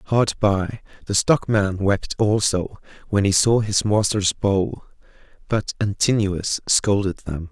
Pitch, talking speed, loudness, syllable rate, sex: 100 Hz, 130 wpm, -20 LUFS, 3.6 syllables/s, male